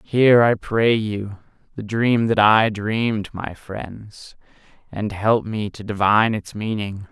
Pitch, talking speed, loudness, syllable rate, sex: 105 Hz, 150 wpm, -20 LUFS, 3.6 syllables/s, male